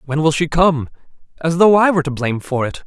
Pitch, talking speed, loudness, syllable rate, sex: 155 Hz, 230 wpm, -16 LUFS, 5.5 syllables/s, male